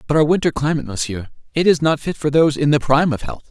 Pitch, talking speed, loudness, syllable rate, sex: 145 Hz, 255 wpm, -18 LUFS, 7.2 syllables/s, male